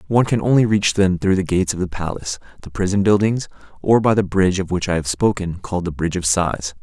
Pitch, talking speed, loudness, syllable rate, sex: 95 Hz, 245 wpm, -19 LUFS, 6.5 syllables/s, male